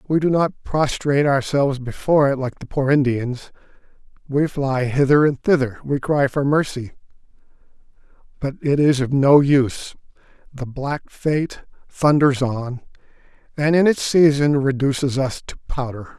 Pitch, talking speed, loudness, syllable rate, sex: 140 Hz, 140 wpm, -19 LUFS, 4.7 syllables/s, male